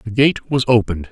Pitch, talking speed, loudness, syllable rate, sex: 115 Hz, 215 wpm, -16 LUFS, 6.3 syllables/s, male